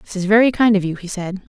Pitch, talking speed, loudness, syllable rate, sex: 200 Hz, 310 wpm, -17 LUFS, 6.4 syllables/s, female